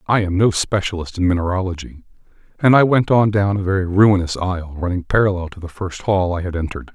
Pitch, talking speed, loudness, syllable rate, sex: 95 Hz, 205 wpm, -18 LUFS, 6.1 syllables/s, male